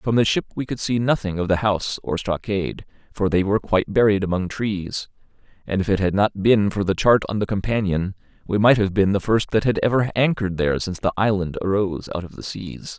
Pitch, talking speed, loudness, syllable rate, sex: 100 Hz, 230 wpm, -21 LUFS, 5.9 syllables/s, male